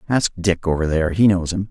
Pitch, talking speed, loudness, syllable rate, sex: 90 Hz, 245 wpm, -19 LUFS, 6.0 syllables/s, male